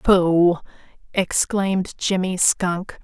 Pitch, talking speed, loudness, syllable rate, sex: 185 Hz, 80 wpm, -20 LUFS, 3.0 syllables/s, female